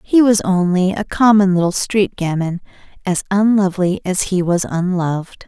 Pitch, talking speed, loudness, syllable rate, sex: 190 Hz, 155 wpm, -16 LUFS, 4.8 syllables/s, female